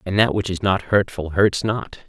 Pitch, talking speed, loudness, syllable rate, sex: 95 Hz, 230 wpm, -20 LUFS, 4.6 syllables/s, male